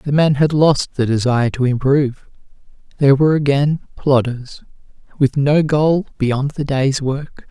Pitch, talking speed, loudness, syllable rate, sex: 140 Hz, 150 wpm, -16 LUFS, 4.4 syllables/s, male